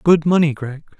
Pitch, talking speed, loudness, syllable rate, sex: 155 Hz, 180 wpm, -16 LUFS, 5.3 syllables/s, male